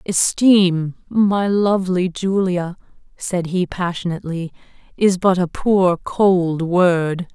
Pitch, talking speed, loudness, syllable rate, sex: 180 Hz, 105 wpm, -18 LUFS, 3.4 syllables/s, female